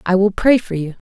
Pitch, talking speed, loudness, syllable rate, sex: 195 Hz, 280 wpm, -16 LUFS, 5.8 syllables/s, female